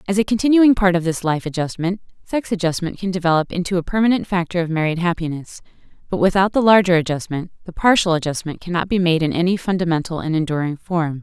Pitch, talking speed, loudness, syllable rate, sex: 175 Hz, 190 wpm, -19 LUFS, 6.4 syllables/s, female